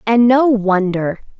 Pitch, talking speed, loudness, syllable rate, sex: 215 Hz, 130 wpm, -14 LUFS, 3.5 syllables/s, female